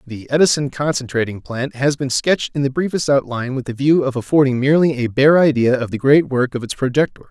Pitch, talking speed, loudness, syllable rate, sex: 135 Hz, 220 wpm, -17 LUFS, 6.1 syllables/s, male